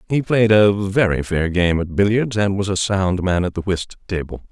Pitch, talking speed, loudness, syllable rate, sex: 95 Hz, 225 wpm, -18 LUFS, 4.8 syllables/s, male